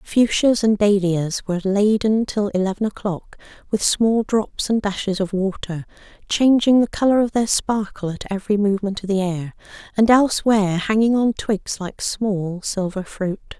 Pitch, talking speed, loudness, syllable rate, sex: 205 Hz, 160 wpm, -20 LUFS, 4.7 syllables/s, female